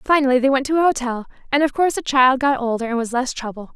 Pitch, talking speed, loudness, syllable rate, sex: 260 Hz, 270 wpm, -19 LUFS, 6.9 syllables/s, female